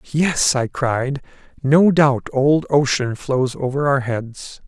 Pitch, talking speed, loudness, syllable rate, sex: 135 Hz, 140 wpm, -18 LUFS, 3.2 syllables/s, male